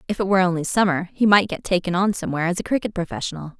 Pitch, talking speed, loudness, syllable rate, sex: 185 Hz, 250 wpm, -21 LUFS, 7.8 syllables/s, female